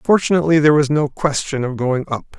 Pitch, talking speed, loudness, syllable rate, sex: 145 Hz, 225 wpm, -17 LUFS, 6.5 syllables/s, male